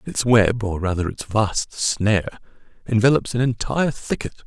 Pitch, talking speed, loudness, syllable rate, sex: 110 Hz, 150 wpm, -21 LUFS, 5.0 syllables/s, male